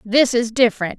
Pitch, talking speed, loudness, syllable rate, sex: 230 Hz, 180 wpm, -17 LUFS, 5.3 syllables/s, female